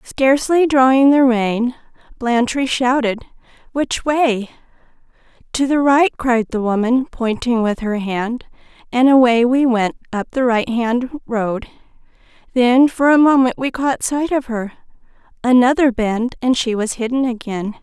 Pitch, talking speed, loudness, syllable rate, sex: 245 Hz, 140 wpm, -16 LUFS, 4.3 syllables/s, female